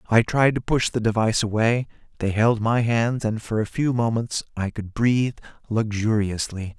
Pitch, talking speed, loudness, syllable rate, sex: 110 Hz, 175 wpm, -23 LUFS, 4.8 syllables/s, male